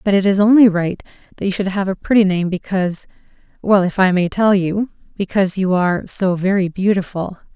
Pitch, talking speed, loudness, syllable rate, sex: 190 Hz, 190 wpm, -17 LUFS, 5.7 syllables/s, female